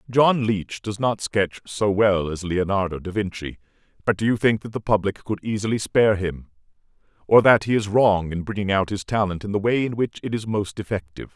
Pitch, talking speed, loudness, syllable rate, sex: 105 Hz, 215 wpm, -22 LUFS, 5.4 syllables/s, male